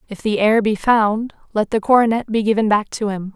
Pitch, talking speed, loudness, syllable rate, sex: 215 Hz, 230 wpm, -17 LUFS, 5.4 syllables/s, female